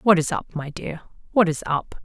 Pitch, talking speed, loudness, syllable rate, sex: 170 Hz, 205 wpm, -23 LUFS, 5.0 syllables/s, female